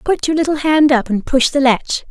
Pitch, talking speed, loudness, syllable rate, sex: 280 Hz, 255 wpm, -14 LUFS, 5.8 syllables/s, female